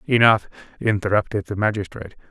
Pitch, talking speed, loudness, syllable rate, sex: 100 Hz, 105 wpm, -20 LUFS, 6.3 syllables/s, male